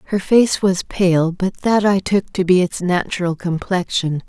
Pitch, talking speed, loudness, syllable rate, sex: 185 Hz, 180 wpm, -17 LUFS, 4.2 syllables/s, female